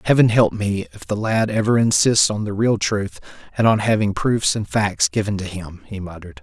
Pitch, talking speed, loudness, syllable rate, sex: 105 Hz, 215 wpm, -19 LUFS, 5.1 syllables/s, male